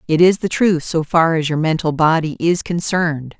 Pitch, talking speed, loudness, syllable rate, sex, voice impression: 165 Hz, 210 wpm, -17 LUFS, 5.0 syllables/s, female, feminine, slightly powerful, clear, intellectual, calm, lively, strict, slightly sharp